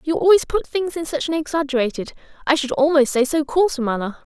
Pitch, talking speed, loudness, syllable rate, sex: 300 Hz, 205 wpm, -19 LUFS, 6.3 syllables/s, female